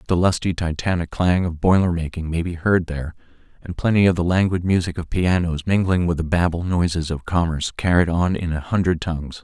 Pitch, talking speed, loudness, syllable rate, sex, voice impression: 85 Hz, 205 wpm, -20 LUFS, 5.7 syllables/s, male, very masculine, very adult-like, very middle-aged, very thick, slightly relaxed, slightly powerful, dark, soft, clear, muffled, fluent, very cool, very intellectual, refreshing, sincere, calm, very mature, friendly, reassuring, unique, very elegant, wild, sweet, kind, modest